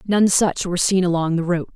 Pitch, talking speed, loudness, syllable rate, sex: 180 Hz, 240 wpm, -19 LUFS, 6.4 syllables/s, female